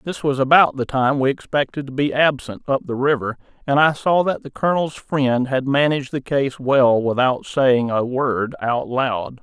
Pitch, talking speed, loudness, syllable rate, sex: 135 Hz, 195 wpm, -19 LUFS, 4.6 syllables/s, male